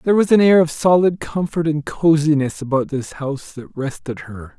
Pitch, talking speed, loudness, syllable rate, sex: 155 Hz, 195 wpm, -17 LUFS, 5.2 syllables/s, male